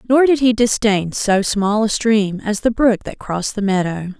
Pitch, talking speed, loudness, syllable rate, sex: 215 Hz, 215 wpm, -17 LUFS, 4.7 syllables/s, female